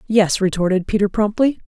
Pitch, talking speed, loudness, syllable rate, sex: 205 Hz, 145 wpm, -18 LUFS, 5.5 syllables/s, female